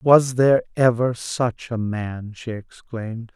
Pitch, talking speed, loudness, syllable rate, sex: 120 Hz, 145 wpm, -21 LUFS, 3.9 syllables/s, male